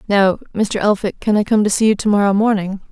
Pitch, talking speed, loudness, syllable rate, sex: 205 Hz, 225 wpm, -16 LUFS, 6.0 syllables/s, female